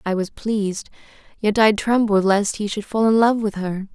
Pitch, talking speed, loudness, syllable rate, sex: 210 Hz, 215 wpm, -19 LUFS, 4.9 syllables/s, female